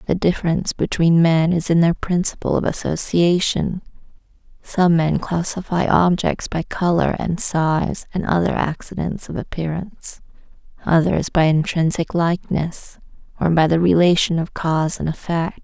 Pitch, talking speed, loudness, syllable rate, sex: 170 Hz, 135 wpm, -19 LUFS, 4.7 syllables/s, female